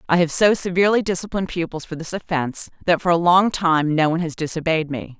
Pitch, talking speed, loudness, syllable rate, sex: 170 Hz, 220 wpm, -20 LUFS, 6.4 syllables/s, female